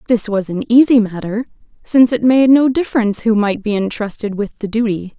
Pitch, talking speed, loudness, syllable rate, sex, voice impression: 220 Hz, 195 wpm, -15 LUFS, 5.6 syllables/s, female, very feminine, young, very thin, slightly tensed, slightly weak, very bright, soft, very clear, fluent, slightly raspy, cute, intellectual, very refreshing, sincere, calm, friendly, reassuring, very unique, elegant, very sweet, very lively, slightly kind, sharp, slightly modest, light